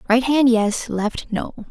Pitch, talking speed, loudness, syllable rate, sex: 235 Hz, 175 wpm, -19 LUFS, 3.6 syllables/s, female